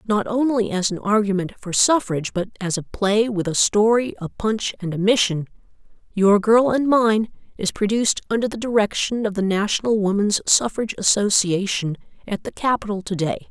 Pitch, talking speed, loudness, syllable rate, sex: 210 Hz, 175 wpm, -20 LUFS, 5.2 syllables/s, female